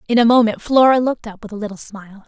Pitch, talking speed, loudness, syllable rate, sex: 225 Hz, 265 wpm, -15 LUFS, 7.2 syllables/s, female